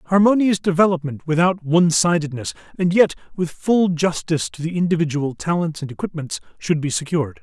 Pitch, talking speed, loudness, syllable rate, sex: 165 Hz, 155 wpm, -20 LUFS, 5.8 syllables/s, male